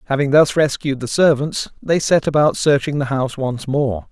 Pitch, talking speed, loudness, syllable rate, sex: 140 Hz, 190 wpm, -17 LUFS, 5.0 syllables/s, male